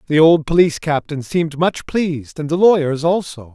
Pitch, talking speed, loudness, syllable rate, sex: 155 Hz, 185 wpm, -17 LUFS, 5.4 syllables/s, male